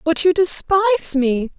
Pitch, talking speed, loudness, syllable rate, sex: 330 Hz, 150 wpm, -16 LUFS, 5.4 syllables/s, female